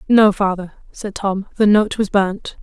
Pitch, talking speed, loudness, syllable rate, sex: 205 Hz, 185 wpm, -17 LUFS, 4.2 syllables/s, female